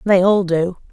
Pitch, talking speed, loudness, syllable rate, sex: 185 Hz, 195 wpm, -16 LUFS, 4.2 syllables/s, female